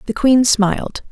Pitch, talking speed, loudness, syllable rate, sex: 230 Hz, 160 wpm, -15 LUFS, 4.4 syllables/s, female